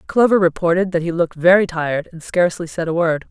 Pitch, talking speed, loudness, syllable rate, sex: 170 Hz, 220 wpm, -17 LUFS, 6.4 syllables/s, female